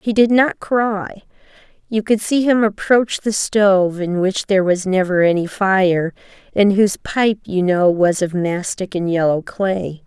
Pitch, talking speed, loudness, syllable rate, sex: 195 Hz, 175 wpm, -17 LUFS, 4.2 syllables/s, female